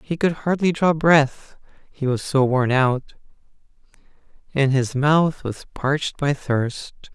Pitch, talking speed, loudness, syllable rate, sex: 140 Hz, 145 wpm, -20 LUFS, 3.7 syllables/s, male